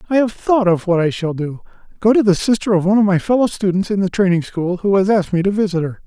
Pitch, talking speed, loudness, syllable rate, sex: 190 Hz, 275 wpm, -16 LUFS, 6.6 syllables/s, male